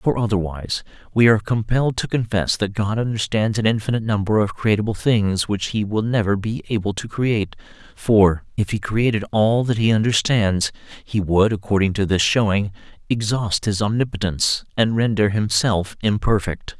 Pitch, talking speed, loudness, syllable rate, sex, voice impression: 105 Hz, 160 wpm, -20 LUFS, 5.1 syllables/s, male, very masculine, very adult-like, very middle-aged, very thick, very tensed, very powerful, bright, soft, very clear, very fluent, slightly raspy, very cool, very intellectual, slightly refreshing, very sincere, calm, very mature, very friendly, very reassuring, very unique, elegant, slightly wild, very sweet, very lively, very kind, slightly modest